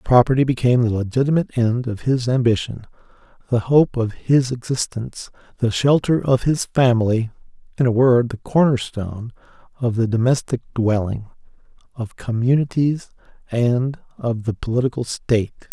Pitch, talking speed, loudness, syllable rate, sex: 120 Hz, 135 wpm, -19 LUFS, 5.1 syllables/s, male